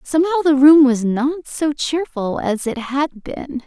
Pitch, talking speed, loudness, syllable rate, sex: 280 Hz, 180 wpm, -17 LUFS, 4.1 syllables/s, female